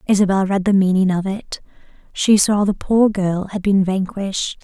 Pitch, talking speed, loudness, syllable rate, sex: 195 Hz, 180 wpm, -17 LUFS, 4.8 syllables/s, female